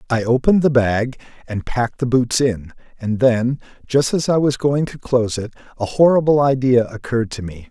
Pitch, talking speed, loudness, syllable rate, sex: 125 Hz, 195 wpm, -18 LUFS, 5.3 syllables/s, male